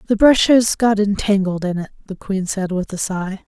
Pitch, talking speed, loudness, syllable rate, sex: 200 Hz, 220 wpm, -17 LUFS, 4.8 syllables/s, female